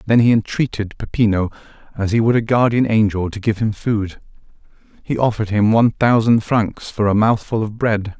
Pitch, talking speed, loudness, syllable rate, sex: 110 Hz, 185 wpm, -17 LUFS, 5.3 syllables/s, male